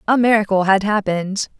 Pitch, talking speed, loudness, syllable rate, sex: 205 Hz, 150 wpm, -17 LUFS, 5.8 syllables/s, female